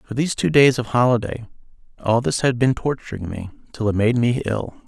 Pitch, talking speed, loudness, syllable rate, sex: 120 Hz, 210 wpm, -20 LUFS, 5.8 syllables/s, male